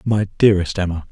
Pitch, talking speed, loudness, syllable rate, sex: 95 Hz, 160 wpm, -17 LUFS, 6.5 syllables/s, male